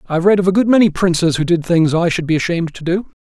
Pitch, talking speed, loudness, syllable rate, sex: 175 Hz, 300 wpm, -15 LUFS, 7.1 syllables/s, male